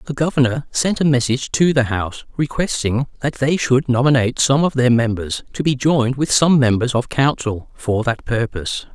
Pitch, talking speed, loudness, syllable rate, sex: 130 Hz, 190 wpm, -18 LUFS, 5.2 syllables/s, male